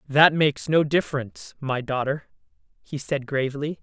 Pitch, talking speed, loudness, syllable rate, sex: 140 Hz, 140 wpm, -23 LUFS, 5.1 syllables/s, female